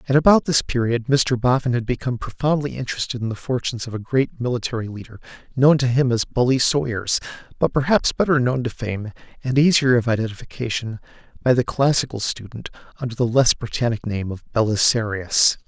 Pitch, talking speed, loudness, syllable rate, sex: 125 Hz, 170 wpm, -20 LUFS, 5.8 syllables/s, male